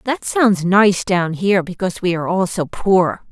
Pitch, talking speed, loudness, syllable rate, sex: 190 Hz, 200 wpm, -17 LUFS, 4.8 syllables/s, female